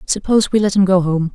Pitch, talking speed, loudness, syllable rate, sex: 190 Hz, 270 wpm, -15 LUFS, 6.4 syllables/s, female